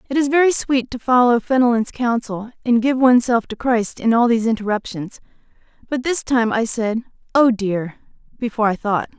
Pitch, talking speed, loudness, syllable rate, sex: 235 Hz, 175 wpm, -18 LUFS, 5.4 syllables/s, female